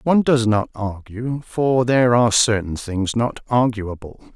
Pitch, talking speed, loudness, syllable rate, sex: 115 Hz, 150 wpm, -19 LUFS, 4.5 syllables/s, male